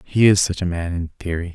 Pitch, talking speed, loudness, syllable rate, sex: 90 Hz, 270 wpm, -20 LUFS, 5.9 syllables/s, male